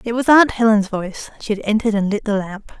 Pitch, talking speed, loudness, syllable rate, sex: 215 Hz, 255 wpm, -17 LUFS, 6.2 syllables/s, female